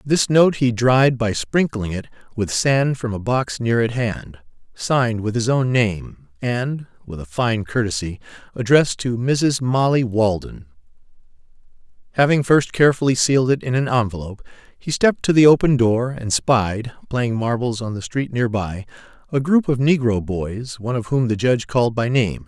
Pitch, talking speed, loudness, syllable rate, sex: 120 Hz, 175 wpm, -19 LUFS, 4.8 syllables/s, male